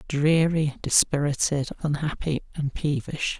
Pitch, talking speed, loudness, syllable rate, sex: 145 Hz, 90 wpm, -24 LUFS, 4.0 syllables/s, male